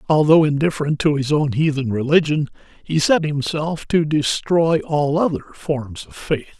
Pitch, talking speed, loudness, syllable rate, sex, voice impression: 150 Hz, 155 wpm, -19 LUFS, 4.6 syllables/s, male, masculine, old, powerful, slightly soft, slightly halting, raspy, mature, friendly, reassuring, wild, lively, slightly kind